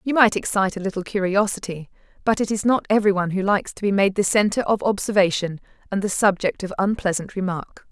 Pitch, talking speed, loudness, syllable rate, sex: 200 Hz, 205 wpm, -21 LUFS, 6.4 syllables/s, female